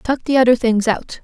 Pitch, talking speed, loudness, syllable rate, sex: 240 Hz, 240 wpm, -16 LUFS, 5.5 syllables/s, female